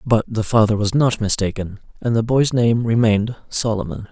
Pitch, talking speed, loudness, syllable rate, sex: 110 Hz, 175 wpm, -18 LUFS, 5.2 syllables/s, male